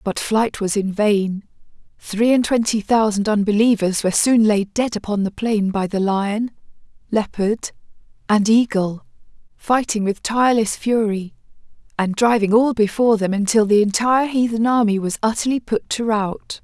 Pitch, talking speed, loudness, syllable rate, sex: 215 Hz, 150 wpm, -18 LUFS, 4.7 syllables/s, female